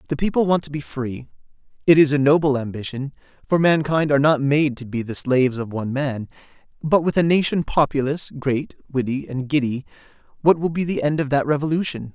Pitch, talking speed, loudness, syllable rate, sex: 145 Hz, 200 wpm, -20 LUFS, 5.8 syllables/s, male